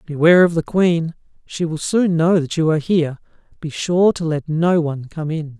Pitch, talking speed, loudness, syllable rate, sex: 160 Hz, 215 wpm, -18 LUFS, 5.2 syllables/s, male